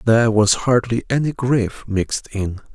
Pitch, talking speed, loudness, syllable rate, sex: 115 Hz, 155 wpm, -19 LUFS, 4.6 syllables/s, male